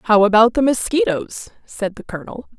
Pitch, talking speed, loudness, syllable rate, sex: 225 Hz, 160 wpm, -17 LUFS, 5.1 syllables/s, female